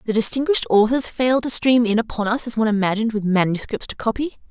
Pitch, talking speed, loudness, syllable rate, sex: 225 Hz, 215 wpm, -19 LUFS, 6.6 syllables/s, female